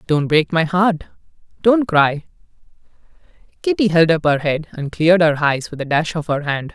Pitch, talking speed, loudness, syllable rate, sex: 165 Hz, 180 wpm, -17 LUFS, 5.0 syllables/s, male